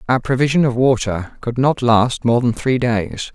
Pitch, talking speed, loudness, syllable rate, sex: 120 Hz, 195 wpm, -17 LUFS, 4.4 syllables/s, male